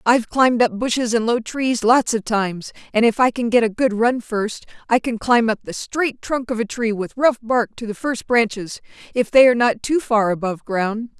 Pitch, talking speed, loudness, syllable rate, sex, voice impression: 230 Hz, 230 wpm, -19 LUFS, 5.1 syllables/s, female, feminine, adult-like, tensed, slightly powerful, clear, slightly nasal, intellectual, calm, friendly, reassuring, slightly sharp